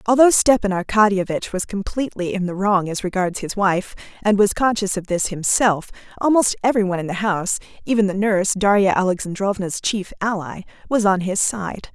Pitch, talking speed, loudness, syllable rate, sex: 200 Hz, 175 wpm, -19 LUFS, 4.4 syllables/s, female